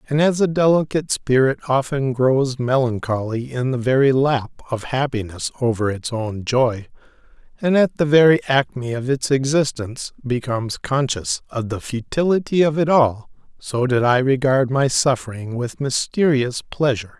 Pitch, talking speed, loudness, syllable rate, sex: 130 Hz, 150 wpm, -19 LUFS, 4.7 syllables/s, male